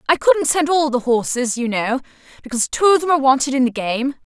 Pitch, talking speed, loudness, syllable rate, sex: 270 Hz, 235 wpm, -18 LUFS, 6.0 syllables/s, female